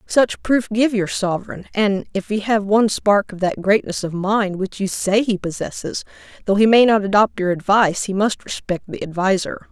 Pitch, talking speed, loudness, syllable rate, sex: 200 Hz, 205 wpm, -19 LUFS, 5.0 syllables/s, female